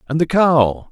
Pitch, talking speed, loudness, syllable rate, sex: 140 Hz, 200 wpm, -15 LUFS, 4.2 syllables/s, male